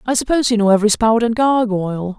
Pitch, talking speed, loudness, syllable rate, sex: 220 Hz, 220 wpm, -15 LUFS, 6.8 syllables/s, female